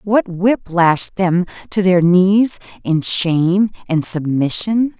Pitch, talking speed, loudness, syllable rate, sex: 185 Hz, 130 wpm, -16 LUFS, 3.3 syllables/s, female